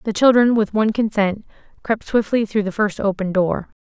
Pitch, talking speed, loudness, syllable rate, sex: 210 Hz, 190 wpm, -19 LUFS, 5.3 syllables/s, female